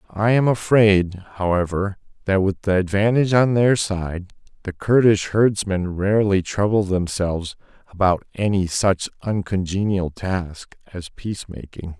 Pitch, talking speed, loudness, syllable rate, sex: 95 Hz, 125 wpm, -20 LUFS, 4.4 syllables/s, male